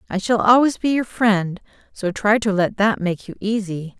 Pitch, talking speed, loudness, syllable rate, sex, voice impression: 205 Hz, 210 wpm, -19 LUFS, 4.7 syllables/s, female, feminine, slightly middle-aged, tensed, powerful, clear, fluent, intellectual, slightly friendly, reassuring, elegant, lively, intense, sharp